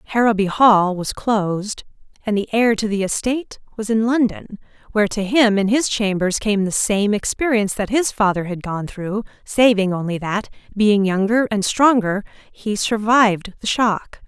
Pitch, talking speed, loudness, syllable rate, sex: 210 Hz, 170 wpm, -18 LUFS, 4.7 syllables/s, female